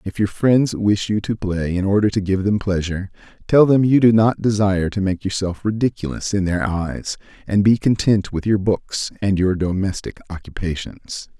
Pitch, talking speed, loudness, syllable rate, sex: 100 Hz, 190 wpm, -19 LUFS, 4.9 syllables/s, male